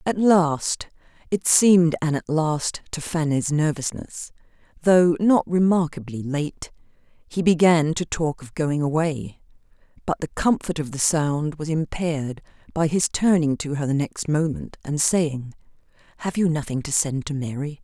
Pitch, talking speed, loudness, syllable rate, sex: 155 Hz, 150 wpm, -22 LUFS, 4.3 syllables/s, female